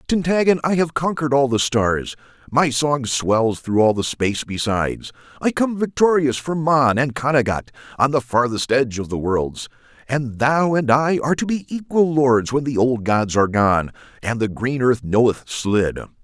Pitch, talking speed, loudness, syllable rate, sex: 130 Hz, 185 wpm, -19 LUFS, 4.8 syllables/s, male